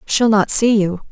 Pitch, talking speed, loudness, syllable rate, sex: 210 Hz, 215 wpm, -14 LUFS, 4.2 syllables/s, female